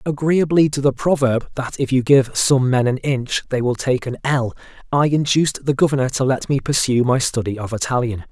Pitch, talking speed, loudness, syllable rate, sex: 130 Hz, 210 wpm, -18 LUFS, 5.3 syllables/s, male